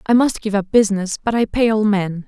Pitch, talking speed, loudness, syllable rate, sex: 210 Hz, 265 wpm, -17 LUFS, 5.7 syllables/s, female